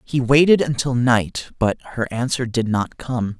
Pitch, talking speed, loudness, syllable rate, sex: 125 Hz, 175 wpm, -19 LUFS, 4.1 syllables/s, male